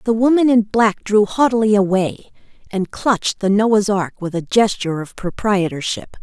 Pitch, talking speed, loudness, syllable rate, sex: 205 Hz, 165 wpm, -17 LUFS, 4.7 syllables/s, female